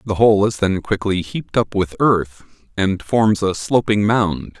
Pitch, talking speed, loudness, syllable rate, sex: 100 Hz, 185 wpm, -18 LUFS, 4.6 syllables/s, male